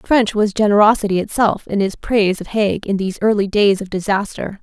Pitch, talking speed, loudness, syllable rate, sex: 205 Hz, 195 wpm, -17 LUFS, 5.6 syllables/s, female